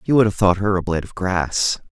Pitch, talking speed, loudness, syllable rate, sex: 95 Hz, 280 wpm, -19 LUFS, 5.8 syllables/s, male